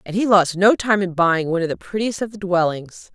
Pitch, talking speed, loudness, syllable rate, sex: 190 Hz, 265 wpm, -19 LUFS, 5.6 syllables/s, female